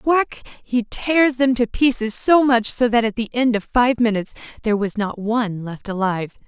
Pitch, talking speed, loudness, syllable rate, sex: 230 Hz, 205 wpm, -19 LUFS, 5.0 syllables/s, female